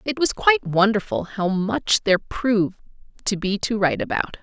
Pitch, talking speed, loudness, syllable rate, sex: 210 Hz, 175 wpm, -21 LUFS, 5.2 syllables/s, female